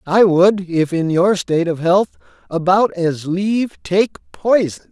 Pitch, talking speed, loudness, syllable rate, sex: 175 Hz, 160 wpm, -16 LUFS, 3.8 syllables/s, male